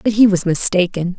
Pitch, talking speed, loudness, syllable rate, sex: 190 Hz, 200 wpm, -15 LUFS, 5.2 syllables/s, female